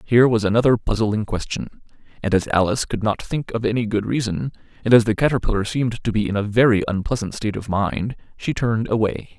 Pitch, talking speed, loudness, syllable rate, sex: 110 Hz, 205 wpm, -21 LUFS, 6.2 syllables/s, male